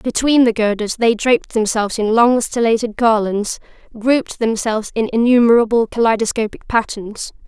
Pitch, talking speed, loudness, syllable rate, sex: 225 Hz, 130 wpm, -16 LUFS, 5.2 syllables/s, female